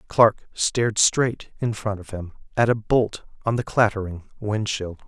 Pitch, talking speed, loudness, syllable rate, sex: 105 Hz, 175 wpm, -23 LUFS, 4.1 syllables/s, male